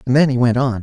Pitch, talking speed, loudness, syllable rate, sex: 125 Hz, 365 wpm, -15 LUFS, 7.0 syllables/s, male